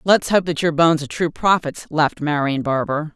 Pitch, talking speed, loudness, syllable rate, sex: 155 Hz, 210 wpm, -19 LUFS, 5.6 syllables/s, female